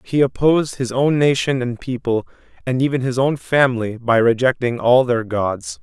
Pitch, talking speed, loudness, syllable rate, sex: 125 Hz, 175 wpm, -18 LUFS, 4.9 syllables/s, male